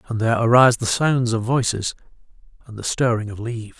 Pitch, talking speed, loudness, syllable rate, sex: 115 Hz, 190 wpm, -20 LUFS, 6.2 syllables/s, male